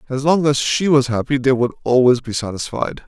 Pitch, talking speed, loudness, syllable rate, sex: 130 Hz, 215 wpm, -17 LUFS, 5.5 syllables/s, male